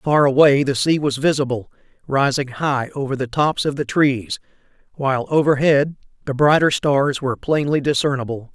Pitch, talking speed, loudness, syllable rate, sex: 140 Hz, 155 wpm, -18 LUFS, 5.0 syllables/s, male